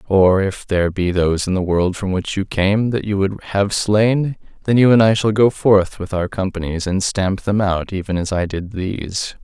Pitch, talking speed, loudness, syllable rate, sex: 100 Hz, 220 wpm, -18 LUFS, 4.8 syllables/s, male